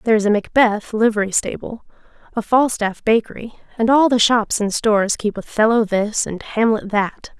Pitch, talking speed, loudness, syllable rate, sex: 220 Hz, 170 wpm, -18 LUFS, 5.0 syllables/s, female